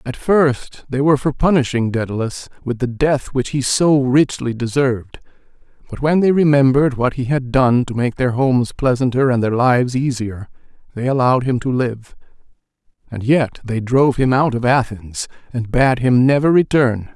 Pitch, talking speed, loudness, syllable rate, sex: 130 Hz, 175 wpm, -17 LUFS, 5.0 syllables/s, male